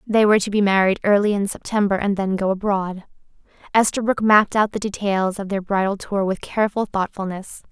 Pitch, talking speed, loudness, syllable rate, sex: 200 Hz, 185 wpm, -20 LUFS, 5.7 syllables/s, female